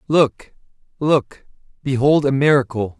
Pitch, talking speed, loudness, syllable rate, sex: 130 Hz, 100 wpm, -18 LUFS, 4.0 syllables/s, male